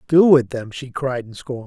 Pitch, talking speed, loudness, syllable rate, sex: 130 Hz, 250 wpm, -18 LUFS, 4.6 syllables/s, male